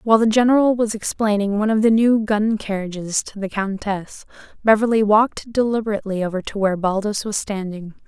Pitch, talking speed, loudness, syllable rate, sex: 210 Hz, 170 wpm, -19 LUFS, 5.9 syllables/s, female